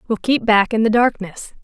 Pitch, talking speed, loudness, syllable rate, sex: 220 Hz, 220 wpm, -16 LUFS, 5.1 syllables/s, female